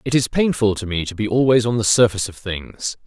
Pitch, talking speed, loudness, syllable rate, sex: 110 Hz, 255 wpm, -19 LUFS, 5.9 syllables/s, male